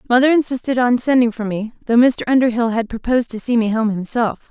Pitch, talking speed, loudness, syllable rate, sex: 235 Hz, 215 wpm, -17 LUFS, 6.1 syllables/s, female